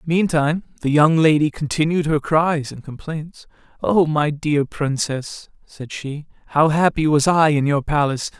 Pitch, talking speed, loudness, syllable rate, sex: 150 Hz, 155 wpm, -19 LUFS, 4.4 syllables/s, male